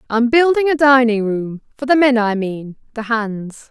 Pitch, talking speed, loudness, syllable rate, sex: 240 Hz, 160 wpm, -15 LUFS, 4.4 syllables/s, female